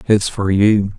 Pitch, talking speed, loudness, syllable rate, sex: 100 Hz, 185 wpm, -15 LUFS, 3.7 syllables/s, male